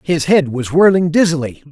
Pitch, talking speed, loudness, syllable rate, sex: 160 Hz, 175 wpm, -14 LUFS, 5.1 syllables/s, male